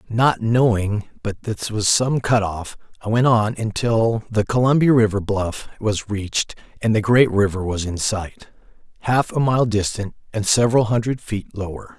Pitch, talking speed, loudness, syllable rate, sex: 110 Hz, 165 wpm, -20 LUFS, 4.5 syllables/s, male